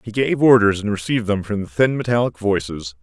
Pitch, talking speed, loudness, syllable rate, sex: 105 Hz, 220 wpm, -18 LUFS, 5.9 syllables/s, male